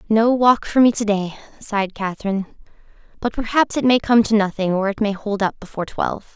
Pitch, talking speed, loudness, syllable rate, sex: 210 Hz, 200 wpm, -19 LUFS, 6.0 syllables/s, female